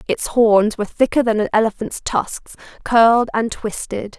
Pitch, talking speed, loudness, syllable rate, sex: 220 Hz, 160 wpm, -17 LUFS, 4.7 syllables/s, female